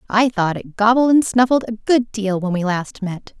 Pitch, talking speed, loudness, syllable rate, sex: 215 Hz, 230 wpm, -18 LUFS, 4.8 syllables/s, female